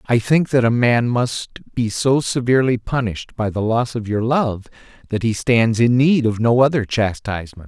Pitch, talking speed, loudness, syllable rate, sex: 120 Hz, 195 wpm, -18 LUFS, 4.8 syllables/s, male